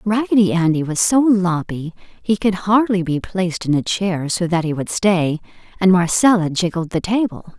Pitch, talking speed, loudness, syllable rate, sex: 185 Hz, 180 wpm, -17 LUFS, 4.8 syllables/s, female